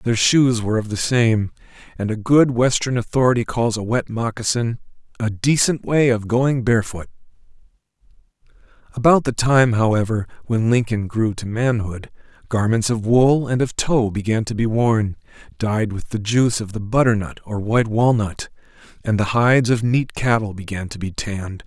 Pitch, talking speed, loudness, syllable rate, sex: 115 Hz, 165 wpm, -19 LUFS, 5.0 syllables/s, male